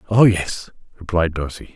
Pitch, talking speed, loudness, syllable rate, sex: 90 Hz, 135 wpm, -19 LUFS, 4.9 syllables/s, male